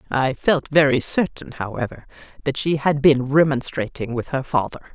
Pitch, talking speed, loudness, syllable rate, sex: 140 Hz, 160 wpm, -20 LUFS, 5.0 syllables/s, female